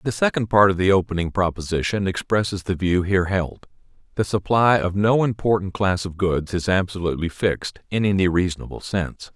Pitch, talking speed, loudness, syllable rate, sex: 95 Hz, 175 wpm, -21 LUFS, 5.7 syllables/s, male